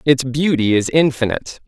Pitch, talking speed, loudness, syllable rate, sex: 130 Hz, 145 wpm, -17 LUFS, 5.3 syllables/s, male